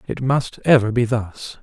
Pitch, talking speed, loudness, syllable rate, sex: 120 Hz, 185 wpm, -19 LUFS, 4.3 syllables/s, male